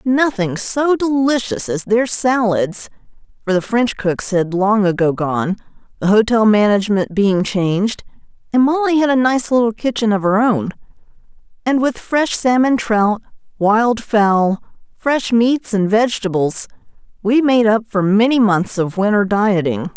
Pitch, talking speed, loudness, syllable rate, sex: 220 Hz, 145 wpm, -16 LUFS, 3.4 syllables/s, female